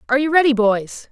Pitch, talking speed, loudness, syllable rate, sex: 260 Hz, 215 wpm, -16 LUFS, 6.5 syllables/s, female